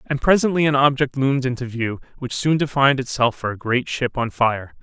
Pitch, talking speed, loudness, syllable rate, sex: 130 Hz, 210 wpm, -20 LUFS, 5.6 syllables/s, male